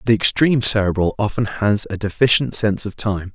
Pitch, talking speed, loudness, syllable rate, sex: 105 Hz, 180 wpm, -18 LUFS, 5.7 syllables/s, male